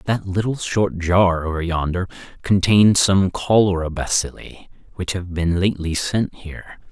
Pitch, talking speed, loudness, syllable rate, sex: 90 Hz, 140 wpm, -19 LUFS, 4.4 syllables/s, male